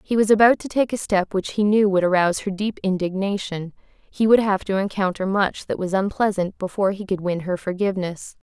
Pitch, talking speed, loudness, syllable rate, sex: 195 Hz, 215 wpm, -21 LUFS, 5.5 syllables/s, female